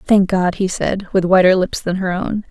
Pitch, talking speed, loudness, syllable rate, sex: 190 Hz, 240 wpm, -16 LUFS, 4.7 syllables/s, female